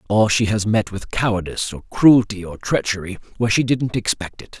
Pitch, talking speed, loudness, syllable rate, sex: 105 Hz, 195 wpm, -19 LUFS, 5.5 syllables/s, male